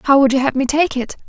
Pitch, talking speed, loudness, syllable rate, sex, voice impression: 270 Hz, 330 wpm, -16 LUFS, 6.0 syllables/s, female, very feminine, slightly adult-like, slightly thin, relaxed, powerful, slightly bright, hard, very muffled, very raspy, cute, intellectual, very refreshing, sincere, slightly calm, very friendly, reassuring, very unique, slightly elegant, very wild, sweet, very lively, slightly kind, intense, sharp, light